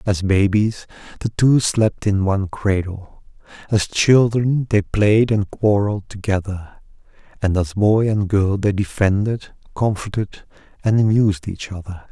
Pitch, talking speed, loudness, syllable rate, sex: 100 Hz, 135 wpm, -19 LUFS, 4.2 syllables/s, male